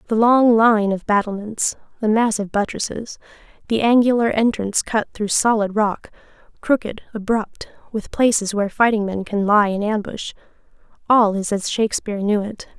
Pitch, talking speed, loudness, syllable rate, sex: 215 Hz, 150 wpm, -19 LUFS, 5.1 syllables/s, female